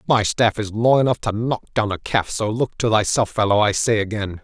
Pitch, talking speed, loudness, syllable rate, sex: 110 Hz, 245 wpm, -20 LUFS, 5.3 syllables/s, male